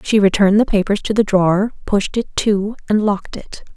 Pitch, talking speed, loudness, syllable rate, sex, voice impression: 205 Hz, 205 wpm, -16 LUFS, 5.4 syllables/s, female, feminine, adult-like, tensed, clear, fluent, intellectual, friendly, reassuring, elegant, slightly lively, kind, slightly modest